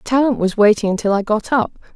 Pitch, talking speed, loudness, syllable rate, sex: 220 Hz, 215 wpm, -17 LUFS, 5.9 syllables/s, female